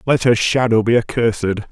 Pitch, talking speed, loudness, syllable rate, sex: 115 Hz, 175 wpm, -16 LUFS, 6.0 syllables/s, male